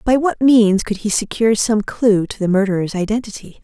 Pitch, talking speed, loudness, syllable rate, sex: 215 Hz, 200 wpm, -16 LUFS, 5.4 syllables/s, female